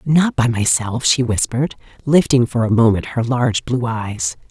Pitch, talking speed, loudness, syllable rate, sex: 120 Hz, 175 wpm, -17 LUFS, 4.7 syllables/s, female